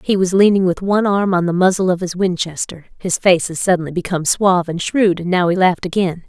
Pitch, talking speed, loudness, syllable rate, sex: 180 Hz, 240 wpm, -16 LUFS, 6.3 syllables/s, female